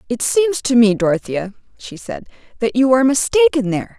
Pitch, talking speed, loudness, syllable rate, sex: 250 Hz, 180 wpm, -16 LUFS, 5.5 syllables/s, female